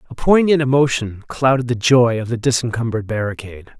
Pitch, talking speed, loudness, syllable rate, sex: 120 Hz, 160 wpm, -17 LUFS, 6.1 syllables/s, male